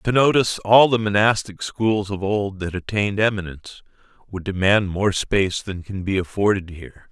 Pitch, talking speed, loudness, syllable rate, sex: 100 Hz, 170 wpm, -20 LUFS, 5.1 syllables/s, male